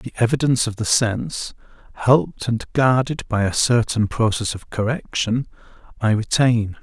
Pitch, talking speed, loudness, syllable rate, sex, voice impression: 115 Hz, 140 wpm, -20 LUFS, 4.7 syllables/s, male, masculine, middle-aged, relaxed, muffled, halting, slightly raspy, calm, mature, friendly, slightly reassuring, kind, modest